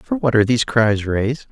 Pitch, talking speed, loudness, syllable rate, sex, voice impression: 120 Hz, 235 wpm, -17 LUFS, 6.1 syllables/s, male, masculine, adult-like, relaxed, weak, dark, slightly muffled, sincere, calm, reassuring, modest